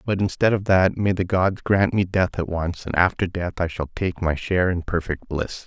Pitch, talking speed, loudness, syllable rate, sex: 90 Hz, 245 wpm, -22 LUFS, 5.0 syllables/s, male